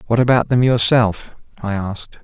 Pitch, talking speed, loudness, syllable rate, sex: 115 Hz, 160 wpm, -16 LUFS, 5.1 syllables/s, male